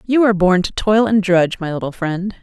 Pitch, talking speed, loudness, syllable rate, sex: 195 Hz, 245 wpm, -16 LUFS, 5.8 syllables/s, female